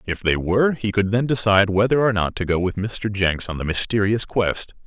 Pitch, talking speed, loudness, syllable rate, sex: 100 Hz, 235 wpm, -20 LUFS, 5.3 syllables/s, male